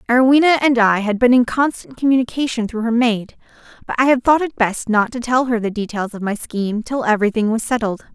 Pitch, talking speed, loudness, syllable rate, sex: 235 Hz, 220 wpm, -17 LUFS, 5.9 syllables/s, female